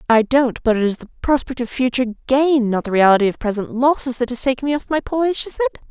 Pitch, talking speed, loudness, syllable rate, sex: 255 Hz, 245 wpm, -18 LUFS, 6.5 syllables/s, female